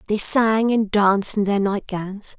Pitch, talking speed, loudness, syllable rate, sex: 205 Hz, 200 wpm, -19 LUFS, 4.1 syllables/s, female